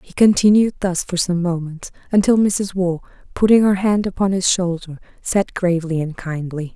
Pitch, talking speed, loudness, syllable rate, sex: 185 Hz, 170 wpm, -18 LUFS, 5.0 syllables/s, female